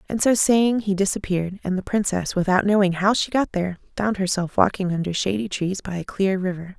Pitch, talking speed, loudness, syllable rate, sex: 195 Hz, 210 wpm, -22 LUFS, 5.7 syllables/s, female